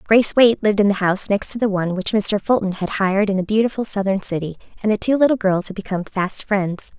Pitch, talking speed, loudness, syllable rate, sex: 200 Hz, 250 wpm, -19 LUFS, 6.6 syllables/s, female